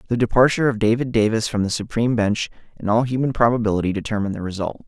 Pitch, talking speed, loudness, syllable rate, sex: 115 Hz, 195 wpm, -20 LUFS, 7.3 syllables/s, male